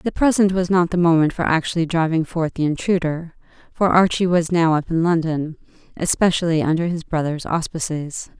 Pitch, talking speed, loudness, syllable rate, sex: 165 Hz, 170 wpm, -19 LUFS, 5.3 syllables/s, female